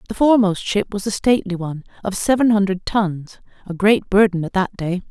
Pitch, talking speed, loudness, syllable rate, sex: 200 Hz, 200 wpm, -18 LUFS, 5.7 syllables/s, female